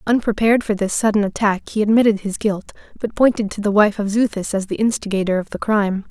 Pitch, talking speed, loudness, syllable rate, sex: 210 Hz, 215 wpm, -18 LUFS, 6.2 syllables/s, female